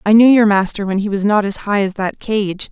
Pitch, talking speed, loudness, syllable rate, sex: 205 Hz, 285 wpm, -15 LUFS, 5.4 syllables/s, female